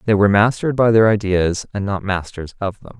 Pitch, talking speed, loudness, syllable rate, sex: 100 Hz, 220 wpm, -17 LUFS, 5.8 syllables/s, male